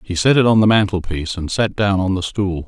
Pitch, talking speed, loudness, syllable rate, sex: 95 Hz, 270 wpm, -17 LUFS, 5.8 syllables/s, male